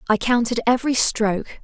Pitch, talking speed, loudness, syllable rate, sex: 235 Hz, 145 wpm, -19 LUFS, 5.8 syllables/s, female